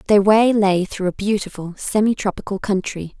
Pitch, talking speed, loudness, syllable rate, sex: 200 Hz, 170 wpm, -19 LUFS, 5.0 syllables/s, female